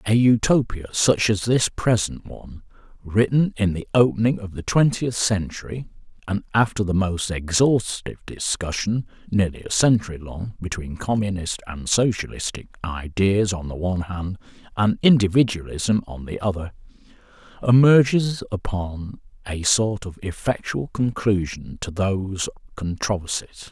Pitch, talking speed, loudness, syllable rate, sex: 100 Hz, 120 wpm, -22 LUFS, 4.6 syllables/s, male